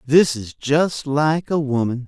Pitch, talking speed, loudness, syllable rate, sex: 140 Hz, 175 wpm, -19 LUFS, 3.6 syllables/s, male